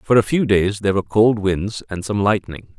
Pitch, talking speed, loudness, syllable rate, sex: 105 Hz, 235 wpm, -18 LUFS, 5.3 syllables/s, male